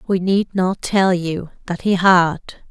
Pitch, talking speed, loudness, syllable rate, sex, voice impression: 185 Hz, 175 wpm, -18 LUFS, 3.8 syllables/s, female, feminine, adult-like, slightly muffled, slightly intellectual, slightly calm, slightly elegant